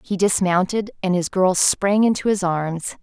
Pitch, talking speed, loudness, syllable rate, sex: 190 Hz, 180 wpm, -19 LUFS, 4.3 syllables/s, female